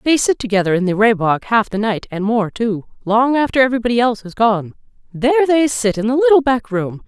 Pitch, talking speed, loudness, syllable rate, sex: 230 Hz, 220 wpm, -16 LUFS, 5.8 syllables/s, female